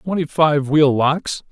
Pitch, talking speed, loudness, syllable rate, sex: 150 Hz, 160 wpm, -17 LUFS, 3.5 syllables/s, male